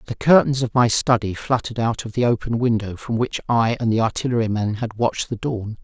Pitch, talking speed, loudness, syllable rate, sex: 115 Hz, 215 wpm, -20 LUFS, 5.8 syllables/s, male